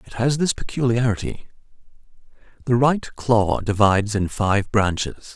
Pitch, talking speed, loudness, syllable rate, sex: 115 Hz, 110 wpm, -21 LUFS, 4.5 syllables/s, male